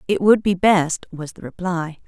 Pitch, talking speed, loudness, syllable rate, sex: 190 Hz, 200 wpm, -19 LUFS, 4.4 syllables/s, female